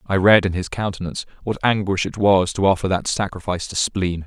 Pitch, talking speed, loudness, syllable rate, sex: 95 Hz, 210 wpm, -20 LUFS, 5.9 syllables/s, male